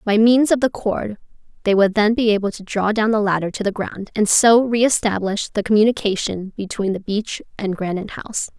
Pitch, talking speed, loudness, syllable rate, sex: 210 Hz, 205 wpm, -19 LUFS, 5.4 syllables/s, female